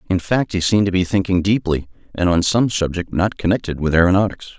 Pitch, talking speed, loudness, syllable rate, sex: 90 Hz, 210 wpm, -18 LUFS, 6.1 syllables/s, male